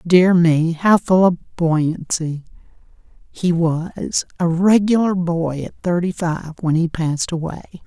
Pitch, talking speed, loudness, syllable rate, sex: 170 Hz, 130 wpm, -18 LUFS, 3.6 syllables/s, female